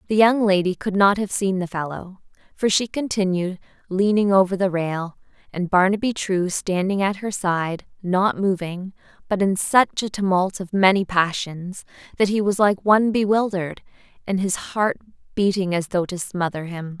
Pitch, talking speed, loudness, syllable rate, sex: 190 Hz, 170 wpm, -21 LUFS, 4.7 syllables/s, female